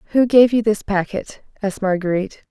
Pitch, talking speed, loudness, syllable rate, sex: 210 Hz, 170 wpm, -18 LUFS, 6.0 syllables/s, female